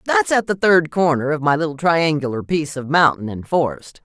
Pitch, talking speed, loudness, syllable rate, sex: 155 Hz, 210 wpm, -18 LUFS, 5.4 syllables/s, female